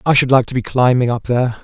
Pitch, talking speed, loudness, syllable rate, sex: 125 Hz, 295 wpm, -15 LUFS, 6.8 syllables/s, male